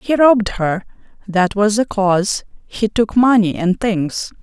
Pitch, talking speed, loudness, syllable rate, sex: 210 Hz, 165 wpm, -16 LUFS, 4.1 syllables/s, female